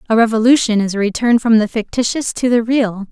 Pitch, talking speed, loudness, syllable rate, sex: 225 Hz, 210 wpm, -15 LUFS, 5.9 syllables/s, female